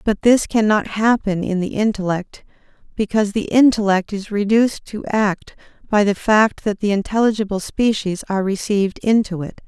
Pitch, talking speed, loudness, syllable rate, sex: 205 Hz, 155 wpm, -18 LUFS, 5.1 syllables/s, female